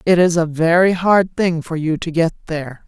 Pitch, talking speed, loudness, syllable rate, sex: 165 Hz, 230 wpm, -17 LUFS, 5.0 syllables/s, female